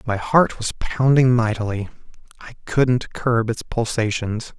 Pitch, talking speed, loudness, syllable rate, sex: 115 Hz, 130 wpm, -20 LUFS, 3.9 syllables/s, male